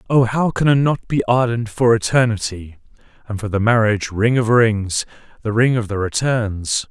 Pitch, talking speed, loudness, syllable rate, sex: 115 Hz, 175 wpm, -17 LUFS, 5.0 syllables/s, male